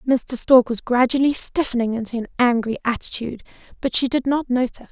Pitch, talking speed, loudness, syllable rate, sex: 245 Hz, 170 wpm, -20 LUFS, 6.2 syllables/s, female